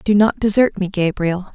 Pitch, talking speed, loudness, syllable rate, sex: 195 Hz, 195 wpm, -17 LUFS, 4.7 syllables/s, female